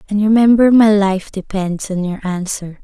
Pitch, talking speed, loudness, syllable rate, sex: 200 Hz, 170 wpm, -14 LUFS, 4.6 syllables/s, female